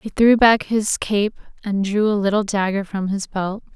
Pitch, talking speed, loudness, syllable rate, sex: 205 Hz, 210 wpm, -19 LUFS, 4.5 syllables/s, female